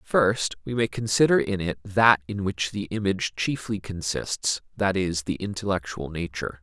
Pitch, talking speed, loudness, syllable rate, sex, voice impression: 95 Hz, 165 wpm, -25 LUFS, 4.7 syllables/s, male, very masculine, adult-like, slightly thick, cool, intellectual, slightly refreshing